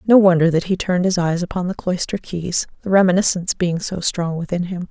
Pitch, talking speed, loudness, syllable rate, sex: 180 Hz, 220 wpm, -19 LUFS, 5.9 syllables/s, female